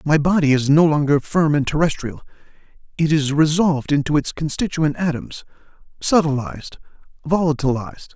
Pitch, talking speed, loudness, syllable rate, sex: 155 Hz, 125 wpm, -18 LUFS, 5.4 syllables/s, male